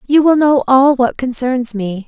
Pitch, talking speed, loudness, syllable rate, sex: 260 Hz, 200 wpm, -13 LUFS, 4.3 syllables/s, female